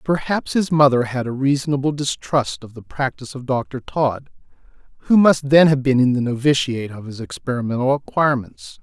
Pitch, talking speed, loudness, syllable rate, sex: 130 Hz, 170 wpm, -19 LUFS, 5.4 syllables/s, male